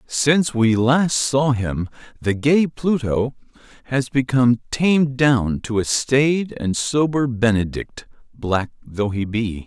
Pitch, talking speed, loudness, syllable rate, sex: 125 Hz, 130 wpm, -19 LUFS, 3.6 syllables/s, male